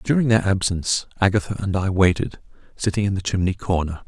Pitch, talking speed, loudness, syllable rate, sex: 95 Hz, 175 wpm, -21 LUFS, 5.9 syllables/s, male